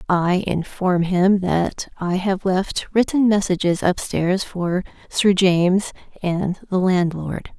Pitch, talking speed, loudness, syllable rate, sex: 185 Hz, 125 wpm, -20 LUFS, 3.5 syllables/s, female